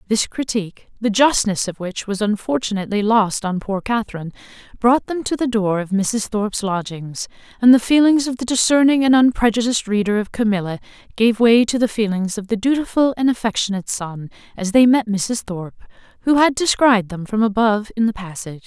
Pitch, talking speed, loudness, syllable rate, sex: 220 Hz, 185 wpm, -18 LUFS, 5.7 syllables/s, female